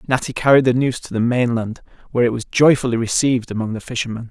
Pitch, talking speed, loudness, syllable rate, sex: 120 Hz, 210 wpm, -18 LUFS, 6.7 syllables/s, male